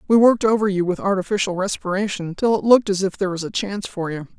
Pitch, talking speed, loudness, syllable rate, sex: 195 Hz, 245 wpm, -20 LUFS, 7.0 syllables/s, female